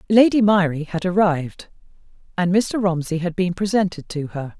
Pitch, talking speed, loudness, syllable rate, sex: 180 Hz, 155 wpm, -20 LUFS, 5.1 syllables/s, female